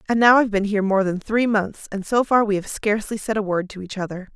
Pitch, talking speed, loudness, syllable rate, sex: 205 Hz, 290 wpm, -21 LUFS, 6.4 syllables/s, female